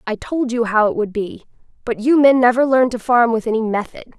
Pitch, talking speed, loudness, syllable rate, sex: 235 Hz, 245 wpm, -17 LUFS, 5.6 syllables/s, female